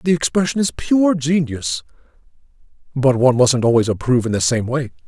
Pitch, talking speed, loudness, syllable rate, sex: 135 Hz, 165 wpm, -17 LUFS, 5.7 syllables/s, male